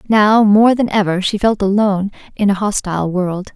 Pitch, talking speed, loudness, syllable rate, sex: 200 Hz, 185 wpm, -14 LUFS, 5.1 syllables/s, female